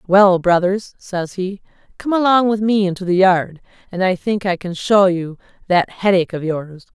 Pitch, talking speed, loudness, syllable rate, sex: 190 Hz, 190 wpm, -17 LUFS, 4.7 syllables/s, female